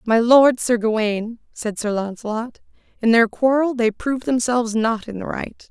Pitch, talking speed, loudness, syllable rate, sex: 230 Hz, 180 wpm, -19 LUFS, 4.9 syllables/s, female